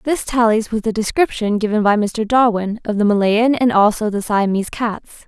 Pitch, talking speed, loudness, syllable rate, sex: 220 Hz, 195 wpm, -17 LUFS, 5.2 syllables/s, female